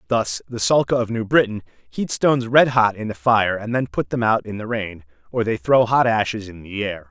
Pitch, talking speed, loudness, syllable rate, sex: 110 Hz, 245 wpm, -20 LUFS, 5.1 syllables/s, male